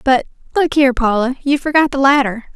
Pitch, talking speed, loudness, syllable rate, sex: 270 Hz, 190 wpm, -15 LUFS, 6.1 syllables/s, female